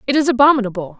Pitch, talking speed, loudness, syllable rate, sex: 240 Hz, 180 wpm, -15 LUFS, 8.4 syllables/s, female